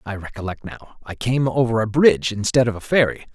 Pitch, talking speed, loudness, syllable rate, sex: 115 Hz, 215 wpm, -20 LUFS, 6.1 syllables/s, male